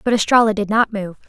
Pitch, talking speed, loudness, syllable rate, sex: 210 Hz, 235 wpm, -16 LUFS, 6.3 syllables/s, female